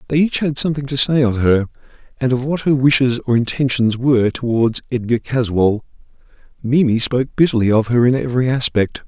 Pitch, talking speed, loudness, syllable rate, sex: 125 Hz, 180 wpm, -16 LUFS, 5.9 syllables/s, male